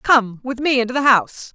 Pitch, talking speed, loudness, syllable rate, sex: 245 Hz, 235 wpm, -17 LUFS, 5.4 syllables/s, female